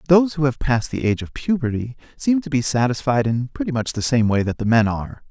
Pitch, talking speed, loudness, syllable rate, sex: 130 Hz, 250 wpm, -20 LUFS, 6.4 syllables/s, male